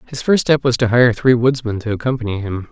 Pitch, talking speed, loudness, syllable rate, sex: 120 Hz, 245 wpm, -16 LUFS, 5.8 syllables/s, male